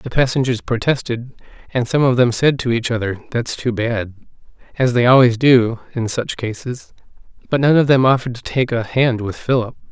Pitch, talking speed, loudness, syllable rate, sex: 120 Hz, 195 wpm, -17 LUFS, 5.3 syllables/s, male